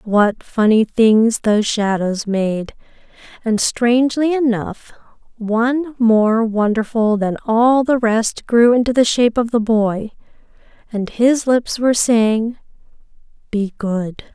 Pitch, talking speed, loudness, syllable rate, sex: 225 Hz, 125 wpm, -16 LUFS, 3.7 syllables/s, female